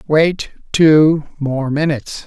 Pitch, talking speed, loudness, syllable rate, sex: 150 Hz, 105 wpm, -15 LUFS, 3.3 syllables/s, male